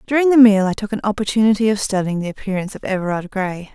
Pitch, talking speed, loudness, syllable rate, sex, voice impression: 205 Hz, 225 wpm, -17 LUFS, 7.0 syllables/s, female, feminine, adult-like, tensed, powerful, slightly hard, clear, fluent, intellectual, calm, elegant, lively, strict, slightly sharp